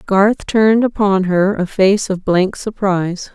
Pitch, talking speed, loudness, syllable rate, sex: 195 Hz, 160 wpm, -15 LUFS, 4.1 syllables/s, female